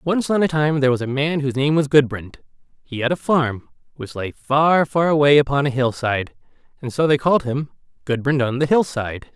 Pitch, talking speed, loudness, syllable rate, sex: 140 Hz, 225 wpm, -19 LUFS, 5.4 syllables/s, male